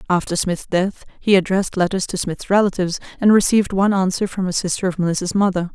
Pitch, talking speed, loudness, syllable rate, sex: 185 Hz, 200 wpm, -19 LUFS, 6.6 syllables/s, female